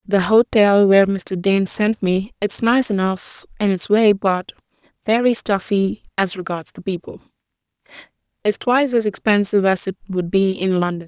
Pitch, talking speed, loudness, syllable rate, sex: 200 Hz, 150 wpm, -18 LUFS, 4.9 syllables/s, female